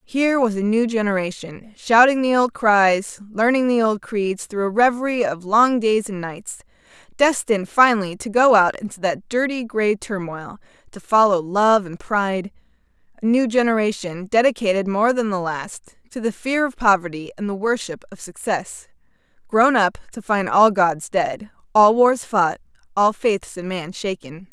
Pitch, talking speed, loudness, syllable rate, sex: 210 Hz, 170 wpm, -19 LUFS, 4.6 syllables/s, female